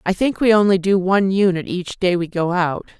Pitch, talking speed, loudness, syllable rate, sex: 190 Hz, 240 wpm, -18 LUFS, 5.3 syllables/s, female